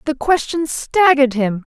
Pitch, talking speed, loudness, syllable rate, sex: 285 Hz, 135 wpm, -16 LUFS, 4.6 syllables/s, female